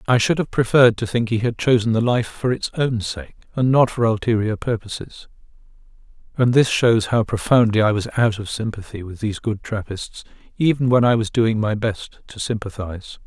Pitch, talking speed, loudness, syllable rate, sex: 115 Hz, 195 wpm, -19 LUFS, 5.3 syllables/s, male